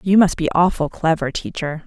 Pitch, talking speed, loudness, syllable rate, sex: 165 Hz, 195 wpm, -19 LUFS, 5.1 syllables/s, female